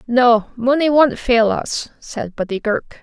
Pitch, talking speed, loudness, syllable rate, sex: 240 Hz, 160 wpm, -17 LUFS, 3.9 syllables/s, female